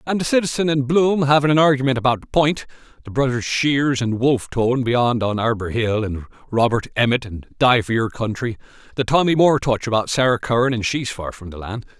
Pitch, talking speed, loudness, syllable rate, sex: 125 Hz, 210 wpm, -19 LUFS, 5.7 syllables/s, male